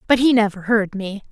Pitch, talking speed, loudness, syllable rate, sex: 215 Hz, 230 wpm, -18 LUFS, 5.5 syllables/s, female